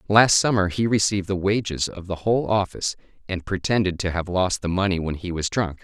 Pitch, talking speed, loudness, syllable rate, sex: 95 Hz, 215 wpm, -22 LUFS, 5.9 syllables/s, male